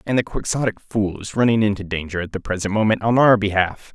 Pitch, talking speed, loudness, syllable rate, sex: 105 Hz, 230 wpm, -20 LUFS, 6.0 syllables/s, male